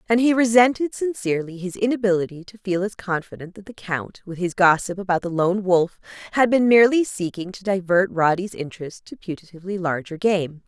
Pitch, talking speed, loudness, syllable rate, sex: 195 Hz, 180 wpm, -21 LUFS, 5.7 syllables/s, female